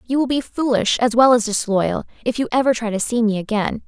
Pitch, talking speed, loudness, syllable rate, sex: 230 Hz, 250 wpm, -19 LUFS, 5.7 syllables/s, female